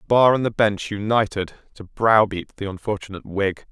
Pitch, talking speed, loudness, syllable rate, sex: 105 Hz, 180 wpm, -21 LUFS, 5.1 syllables/s, male